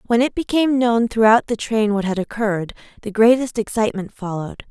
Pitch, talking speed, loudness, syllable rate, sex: 220 Hz, 180 wpm, -19 LUFS, 5.9 syllables/s, female